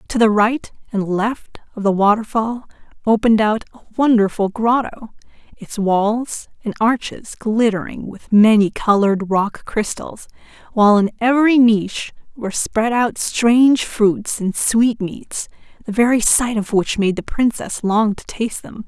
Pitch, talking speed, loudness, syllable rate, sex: 220 Hz, 145 wpm, -17 LUFS, 4.4 syllables/s, female